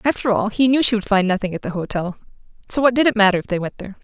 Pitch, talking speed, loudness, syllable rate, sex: 210 Hz, 285 wpm, -18 LUFS, 7.3 syllables/s, female